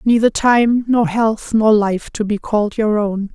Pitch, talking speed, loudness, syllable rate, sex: 215 Hz, 195 wpm, -16 LUFS, 4.0 syllables/s, female